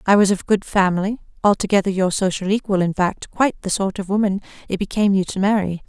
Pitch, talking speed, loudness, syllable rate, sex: 195 Hz, 205 wpm, -19 LUFS, 6.3 syllables/s, female